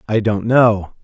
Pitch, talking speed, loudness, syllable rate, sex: 110 Hz, 175 wpm, -15 LUFS, 3.7 syllables/s, male